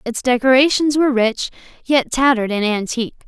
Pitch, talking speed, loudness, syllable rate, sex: 250 Hz, 145 wpm, -16 LUFS, 5.9 syllables/s, female